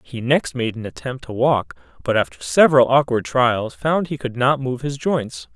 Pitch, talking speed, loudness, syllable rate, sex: 125 Hz, 205 wpm, -19 LUFS, 4.7 syllables/s, male